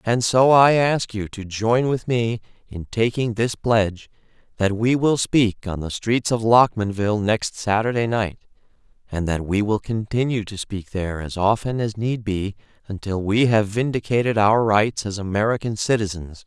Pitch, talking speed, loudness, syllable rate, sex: 110 Hz, 170 wpm, -21 LUFS, 4.6 syllables/s, male